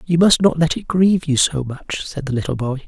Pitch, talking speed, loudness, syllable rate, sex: 155 Hz, 270 wpm, -18 LUFS, 5.4 syllables/s, male